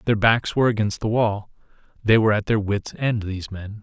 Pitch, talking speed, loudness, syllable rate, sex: 105 Hz, 220 wpm, -21 LUFS, 5.7 syllables/s, male